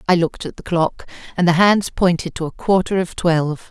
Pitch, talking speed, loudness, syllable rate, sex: 175 Hz, 225 wpm, -18 LUFS, 5.6 syllables/s, female